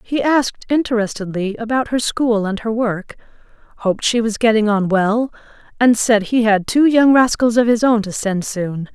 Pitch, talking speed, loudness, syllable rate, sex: 225 Hz, 190 wpm, -16 LUFS, 4.9 syllables/s, female